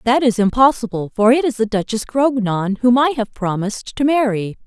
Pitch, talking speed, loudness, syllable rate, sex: 235 Hz, 195 wpm, -17 LUFS, 5.2 syllables/s, female